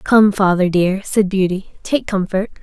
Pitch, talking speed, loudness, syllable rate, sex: 195 Hz, 160 wpm, -16 LUFS, 4.3 syllables/s, female